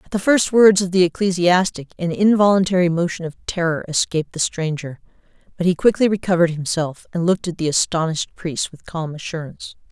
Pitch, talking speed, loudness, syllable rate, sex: 175 Hz, 175 wpm, -19 LUFS, 5.9 syllables/s, female